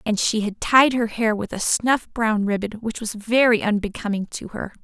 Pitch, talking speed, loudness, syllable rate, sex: 220 Hz, 210 wpm, -21 LUFS, 4.9 syllables/s, female